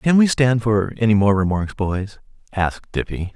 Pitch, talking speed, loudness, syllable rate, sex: 105 Hz, 180 wpm, -19 LUFS, 4.7 syllables/s, male